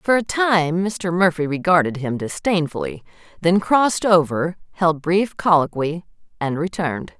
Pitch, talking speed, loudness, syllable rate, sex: 175 Hz, 135 wpm, -19 LUFS, 4.5 syllables/s, female